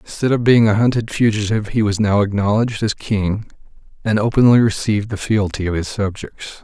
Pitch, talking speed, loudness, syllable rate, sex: 105 Hz, 180 wpm, -17 LUFS, 5.7 syllables/s, male